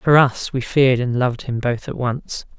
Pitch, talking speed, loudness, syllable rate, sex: 125 Hz, 230 wpm, -19 LUFS, 4.9 syllables/s, male